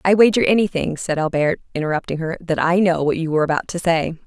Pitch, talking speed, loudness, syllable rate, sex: 170 Hz, 225 wpm, -19 LUFS, 6.4 syllables/s, female